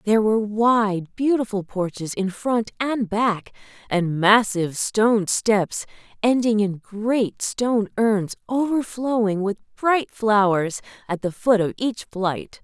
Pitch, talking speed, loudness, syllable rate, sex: 215 Hz, 135 wpm, -22 LUFS, 3.9 syllables/s, female